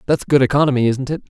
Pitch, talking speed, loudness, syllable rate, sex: 135 Hz, 215 wpm, -17 LUFS, 7.3 syllables/s, male